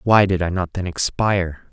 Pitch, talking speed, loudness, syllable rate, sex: 90 Hz, 210 wpm, -20 LUFS, 5.1 syllables/s, male